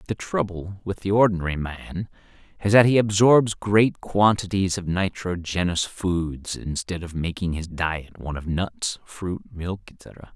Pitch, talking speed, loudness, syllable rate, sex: 95 Hz, 150 wpm, -23 LUFS, 4.1 syllables/s, male